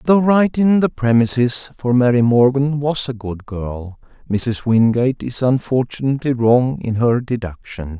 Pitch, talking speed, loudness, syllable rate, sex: 125 Hz, 135 wpm, -17 LUFS, 4.4 syllables/s, male